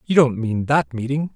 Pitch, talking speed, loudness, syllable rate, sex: 130 Hz, 220 wpm, -20 LUFS, 4.8 syllables/s, male